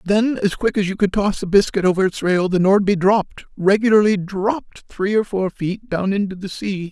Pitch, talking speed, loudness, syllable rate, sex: 195 Hz, 200 wpm, -18 LUFS, 5.1 syllables/s, male